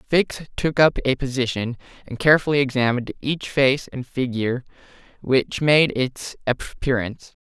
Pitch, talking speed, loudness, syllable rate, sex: 130 Hz, 130 wpm, -21 LUFS, 4.8 syllables/s, male